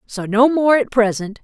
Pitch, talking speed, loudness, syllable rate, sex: 235 Hz, 210 wpm, -16 LUFS, 4.7 syllables/s, female